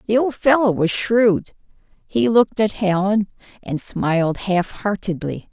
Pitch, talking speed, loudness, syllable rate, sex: 200 Hz, 130 wpm, -19 LUFS, 4.2 syllables/s, female